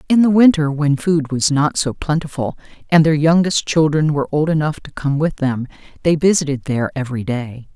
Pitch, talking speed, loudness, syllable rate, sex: 150 Hz, 195 wpm, -17 LUFS, 5.4 syllables/s, female